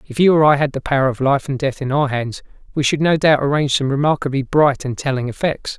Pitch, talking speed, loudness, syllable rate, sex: 140 Hz, 260 wpm, -17 LUFS, 6.2 syllables/s, male